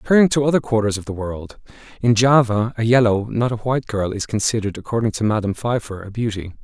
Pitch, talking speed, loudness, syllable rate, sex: 110 Hz, 210 wpm, -19 LUFS, 6.4 syllables/s, male